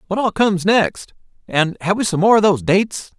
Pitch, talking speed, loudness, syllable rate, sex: 190 Hz, 225 wpm, -17 LUFS, 5.8 syllables/s, male